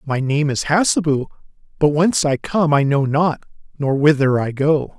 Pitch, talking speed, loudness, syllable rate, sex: 150 Hz, 180 wpm, -17 LUFS, 4.7 syllables/s, male